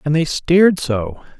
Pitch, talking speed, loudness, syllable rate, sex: 155 Hz, 170 wpm, -16 LUFS, 4.4 syllables/s, male